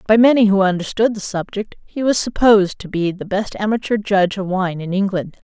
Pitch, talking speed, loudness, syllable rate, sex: 200 Hz, 205 wpm, -17 LUFS, 5.6 syllables/s, female